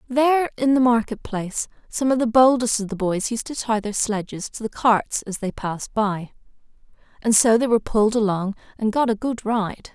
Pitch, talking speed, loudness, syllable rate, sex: 225 Hz, 210 wpm, -21 LUFS, 5.2 syllables/s, female